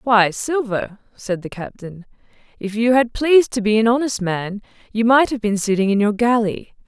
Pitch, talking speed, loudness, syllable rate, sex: 220 Hz, 190 wpm, -18 LUFS, 4.9 syllables/s, female